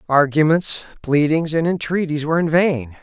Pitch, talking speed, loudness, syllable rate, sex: 155 Hz, 140 wpm, -18 LUFS, 4.9 syllables/s, male